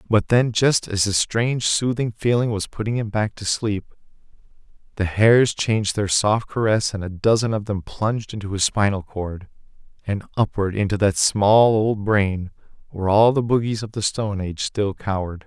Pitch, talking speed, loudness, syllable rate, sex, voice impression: 105 Hz, 180 wpm, -21 LUFS, 5.0 syllables/s, male, very masculine, very adult-like, middle-aged, very thick, slightly relaxed, slightly weak, slightly bright, very soft, muffled, fluent, very cool, very intellectual, refreshing, very sincere, very calm, mature, very friendly, very reassuring, unique, elegant, wild, very sweet, slightly lively, very kind, modest